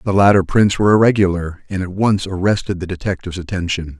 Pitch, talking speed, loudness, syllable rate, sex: 95 Hz, 180 wpm, -17 LUFS, 6.3 syllables/s, male